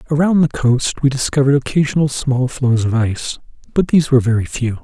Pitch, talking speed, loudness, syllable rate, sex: 130 Hz, 175 wpm, -16 LUFS, 6.1 syllables/s, male